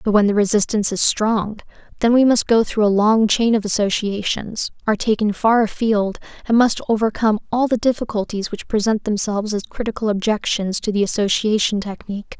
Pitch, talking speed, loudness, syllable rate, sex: 215 Hz, 175 wpm, -18 LUFS, 5.6 syllables/s, female